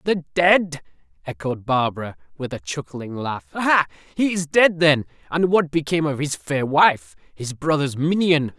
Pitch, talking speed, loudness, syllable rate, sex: 150 Hz, 160 wpm, -20 LUFS, 4.5 syllables/s, male